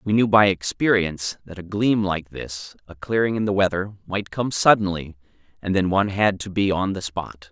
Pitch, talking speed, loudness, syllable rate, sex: 95 Hz, 210 wpm, -22 LUFS, 5.1 syllables/s, male